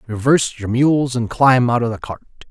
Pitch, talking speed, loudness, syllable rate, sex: 125 Hz, 215 wpm, -16 LUFS, 5.1 syllables/s, male